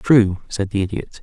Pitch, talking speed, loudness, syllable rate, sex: 105 Hz, 195 wpm, -20 LUFS, 4.4 syllables/s, male